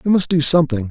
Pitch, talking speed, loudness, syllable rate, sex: 155 Hz, 265 wpm, -15 LUFS, 7.4 syllables/s, male